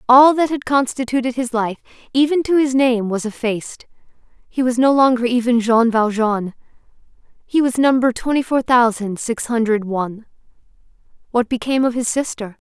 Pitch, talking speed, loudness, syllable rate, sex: 245 Hz, 155 wpm, -17 LUFS, 5.2 syllables/s, female